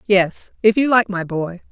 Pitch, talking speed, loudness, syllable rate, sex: 200 Hz, 210 wpm, -18 LUFS, 4.3 syllables/s, female